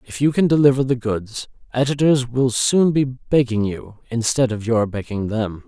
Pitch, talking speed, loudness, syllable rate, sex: 125 Hz, 180 wpm, -19 LUFS, 4.6 syllables/s, male